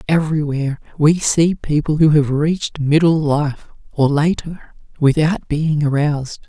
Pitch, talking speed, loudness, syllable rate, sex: 150 Hz, 130 wpm, -17 LUFS, 4.4 syllables/s, male